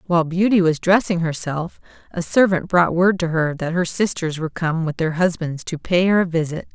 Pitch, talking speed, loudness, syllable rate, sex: 170 Hz, 215 wpm, -19 LUFS, 5.3 syllables/s, female